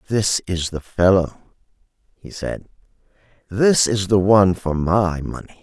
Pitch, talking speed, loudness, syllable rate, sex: 95 Hz, 140 wpm, -19 LUFS, 4.2 syllables/s, male